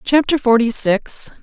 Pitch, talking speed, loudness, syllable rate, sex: 245 Hz, 125 wpm, -16 LUFS, 4.0 syllables/s, female